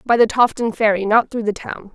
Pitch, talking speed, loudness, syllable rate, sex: 220 Hz, 245 wpm, -17 LUFS, 5.4 syllables/s, female